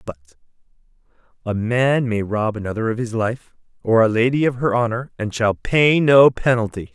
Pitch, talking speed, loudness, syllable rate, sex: 115 Hz, 175 wpm, -18 LUFS, 5.0 syllables/s, male